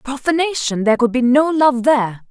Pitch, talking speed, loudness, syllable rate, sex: 265 Hz, 180 wpm, -16 LUFS, 5.4 syllables/s, female